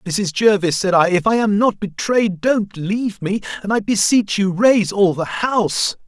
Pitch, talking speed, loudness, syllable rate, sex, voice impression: 200 Hz, 195 wpm, -17 LUFS, 4.5 syllables/s, male, very masculine, adult-like, slightly thick, very tensed, powerful, very bright, hard, very clear, very fluent, slightly raspy, slightly cool, intellectual, very refreshing, slightly sincere, slightly calm, slightly mature, slightly friendly, slightly reassuring, very unique, slightly elegant, wild, slightly sweet, very lively, slightly strict, intense, slightly sharp